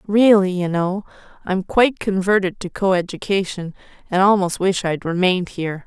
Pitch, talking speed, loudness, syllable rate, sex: 190 Hz, 155 wpm, -19 LUFS, 5.2 syllables/s, female